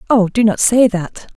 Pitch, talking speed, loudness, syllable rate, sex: 215 Hz, 215 wpm, -14 LUFS, 4.4 syllables/s, female